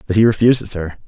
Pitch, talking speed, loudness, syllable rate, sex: 100 Hz, 225 wpm, -15 LUFS, 7.1 syllables/s, male